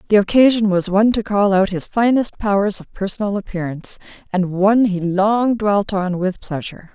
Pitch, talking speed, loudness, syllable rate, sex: 200 Hz, 180 wpm, -17 LUFS, 5.3 syllables/s, female